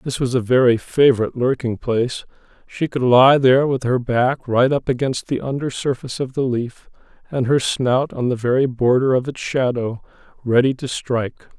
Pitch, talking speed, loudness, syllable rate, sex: 125 Hz, 185 wpm, -18 LUFS, 5.1 syllables/s, male